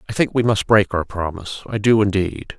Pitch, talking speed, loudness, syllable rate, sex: 100 Hz, 230 wpm, -19 LUFS, 5.8 syllables/s, male